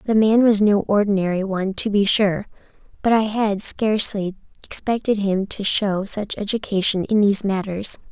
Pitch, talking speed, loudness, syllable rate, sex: 205 Hz, 165 wpm, -20 LUFS, 5.0 syllables/s, female